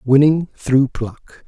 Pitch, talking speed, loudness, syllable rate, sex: 135 Hz, 120 wpm, -17 LUFS, 3.1 syllables/s, male